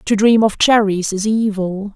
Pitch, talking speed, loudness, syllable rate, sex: 205 Hz, 185 wpm, -15 LUFS, 4.3 syllables/s, female